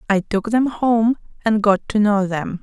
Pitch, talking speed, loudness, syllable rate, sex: 210 Hz, 205 wpm, -18 LUFS, 4.2 syllables/s, female